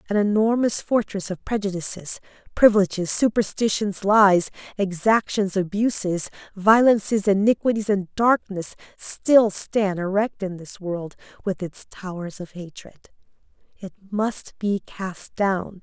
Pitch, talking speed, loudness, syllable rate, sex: 200 Hz, 115 wpm, -22 LUFS, 4.1 syllables/s, female